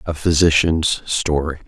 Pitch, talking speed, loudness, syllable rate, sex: 80 Hz, 105 wpm, -17 LUFS, 4.0 syllables/s, male